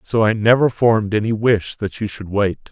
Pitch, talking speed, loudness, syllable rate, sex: 110 Hz, 220 wpm, -17 LUFS, 5.2 syllables/s, male